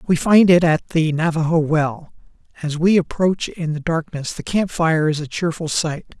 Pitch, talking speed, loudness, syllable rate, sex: 160 Hz, 195 wpm, -18 LUFS, 4.5 syllables/s, male